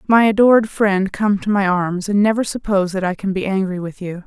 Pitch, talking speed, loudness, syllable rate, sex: 195 Hz, 240 wpm, -17 LUFS, 5.6 syllables/s, female